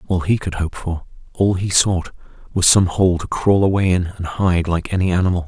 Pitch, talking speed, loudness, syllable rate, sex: 90 Hz, 220 wpm, -18 LUFS, 5.2 syllables/s, male